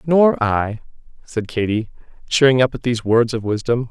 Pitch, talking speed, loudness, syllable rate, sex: 120 Hz, 170 wpm, -18 LUFS, 5.1 syllables/s, male